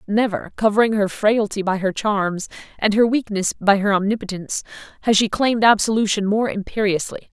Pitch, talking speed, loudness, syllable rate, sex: 205 Hz, 155 wpm, -19 LUFS, 5.4 syllables/s, female